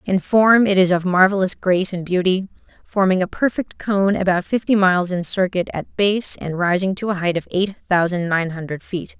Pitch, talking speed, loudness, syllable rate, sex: 185 Hz, 200 wpm, -18 LUFS, 5.1 syllables/s, female